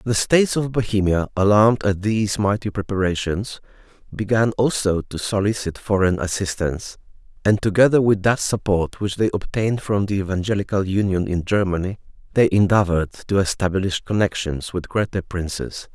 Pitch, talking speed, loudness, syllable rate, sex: 100 Hz, 140 wpm, -20 LUFS, 5.4 syllables/s, male